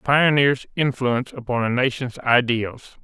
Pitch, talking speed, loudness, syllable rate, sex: 125 Hz, 140 wpm, -21 LUFS, 4.5 syllables/s, male